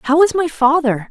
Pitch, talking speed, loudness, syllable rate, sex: 295 Hz, 215 wpm, -15 LUFS, 4.7 syllables/s, female